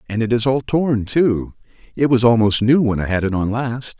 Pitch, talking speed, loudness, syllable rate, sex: 115 Hz, 240 wpm, -17 LUFS, 5.0 syllables/s, male